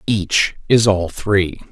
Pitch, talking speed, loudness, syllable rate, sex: 100 Hz, 140 wpm, -17 LUFS, 2.9 syllables/s, male